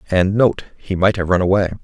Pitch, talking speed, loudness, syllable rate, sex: 95 Hz, 230 wpm, -17 LUFS, 5.6 syllables/s, male